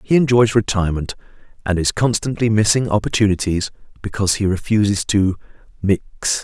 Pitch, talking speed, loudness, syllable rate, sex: 105 Hz, 120 wpm, -18 LUFS, 5.5 syllables/s, male